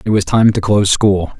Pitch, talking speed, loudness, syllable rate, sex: 100 Hz, 260 wpm, -13 LUFS, 5.8 syllables/s, male